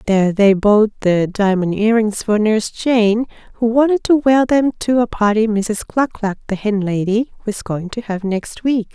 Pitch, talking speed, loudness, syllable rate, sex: 215 Hz, 195 wpm, -16 LUFS, 4.6 syllables/s, female